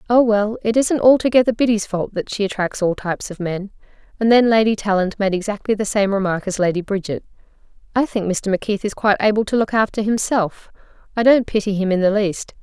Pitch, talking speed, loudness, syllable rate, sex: 210 Hz, 210 wpm, -18 LUFS, 6.0 syllables/s, female